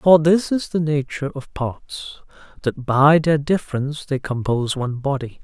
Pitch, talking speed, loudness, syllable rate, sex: 140 Hz, 155 wpm, -20 LUFS, 4.9 syllables/s, male